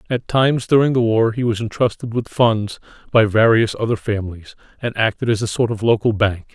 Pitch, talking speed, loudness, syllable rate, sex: 110 Hz, 200 wpm, -18 LUFS, 5.5 syllables/s, male